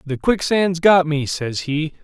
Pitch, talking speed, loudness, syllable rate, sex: 160 Hz, 175 wpm, -18 LUFS, 3.8 syllables/s, male